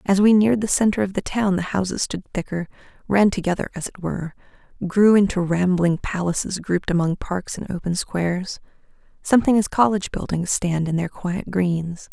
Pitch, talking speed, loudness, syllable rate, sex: 185 Hz, 180 wpm, -21 LUFS, 5.4 syllables/s, female